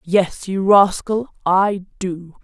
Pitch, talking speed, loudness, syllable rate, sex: 190 Hz, 125 wpm, -18 LUFS, 3.1 syllables/s, female